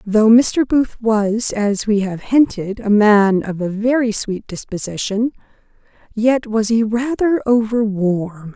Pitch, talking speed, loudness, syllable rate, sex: 220 Hz, 140 wpm, -17 LUFS, 3.7 syllables/s, female